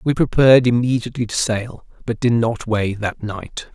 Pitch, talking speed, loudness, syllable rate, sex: 115 Hz, 175 wpm, -18 LUFS, 5.0 syllables/s, male